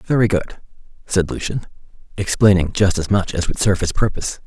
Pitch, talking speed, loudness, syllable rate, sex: 95 Hz, 175 wpm, -19 LUFS, 5.8 syllables/s, male